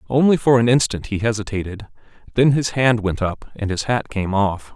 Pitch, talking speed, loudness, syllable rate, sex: 110 Hz, 200 wpm, -19 LUFS, 5.2 syllables/s, male